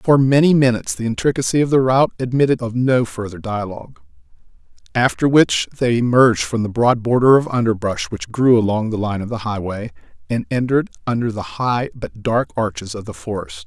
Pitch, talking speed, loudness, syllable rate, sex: 115 Hz, 185 wpm, -18 LUFS, 5.7 syllables/s, male